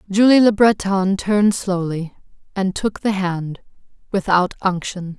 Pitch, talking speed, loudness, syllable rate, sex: 190 Hz, 115 wpm, -18 LUFS, 4.2 syllables/s, female